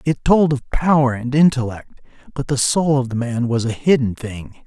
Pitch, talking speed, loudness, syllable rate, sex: 130 Hz, 205 wpm, -18 LUFS, 5.0 syllables/s, male